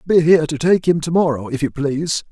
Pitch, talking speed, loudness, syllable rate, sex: 155 Hz, 260 wpm, -17 LUFS, 6.3 syllables/s, male